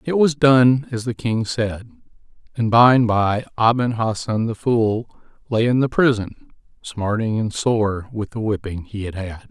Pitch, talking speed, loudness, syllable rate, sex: 115 Hz, 175 wpm, -19 LUFS, 4.2 syllables/s, male